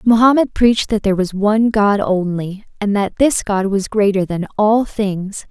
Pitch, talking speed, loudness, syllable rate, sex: 205 Hz, 185 wpm, -16 LUFS, 4.7 syllables/s, female